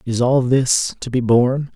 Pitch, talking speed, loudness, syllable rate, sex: 125 Hz, 205 wpm, -17 LUFS, 4.4 syllables/s, male